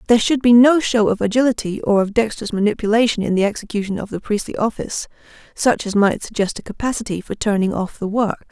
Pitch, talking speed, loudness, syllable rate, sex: 215 Hz, 205 wpm, -18 LUFS, 6.2 syllables/s, female